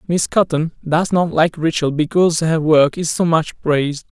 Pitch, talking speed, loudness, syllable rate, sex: 160 Hz, 185 wpm, -17 LUFS, 4.7 syllables/s, male